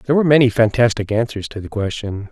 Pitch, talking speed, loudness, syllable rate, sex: 115 Hz, 205 wpm, -17 LUFS, 6.6 syllables/s, male